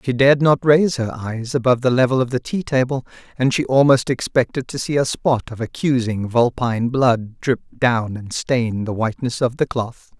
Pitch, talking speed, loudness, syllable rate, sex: 125 Hz, 200 wpm, -19 LUFS, 5.1 syllables/s, male